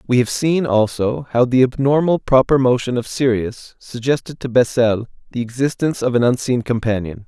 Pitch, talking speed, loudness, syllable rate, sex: 125 Hz, 165 wpm, -17 LUFS, 5.2 syllables/s, male